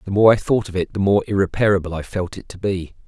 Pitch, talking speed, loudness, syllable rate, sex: 95 Hz, 275 wpm, -20 LUFS, 6.4 syllables/s, male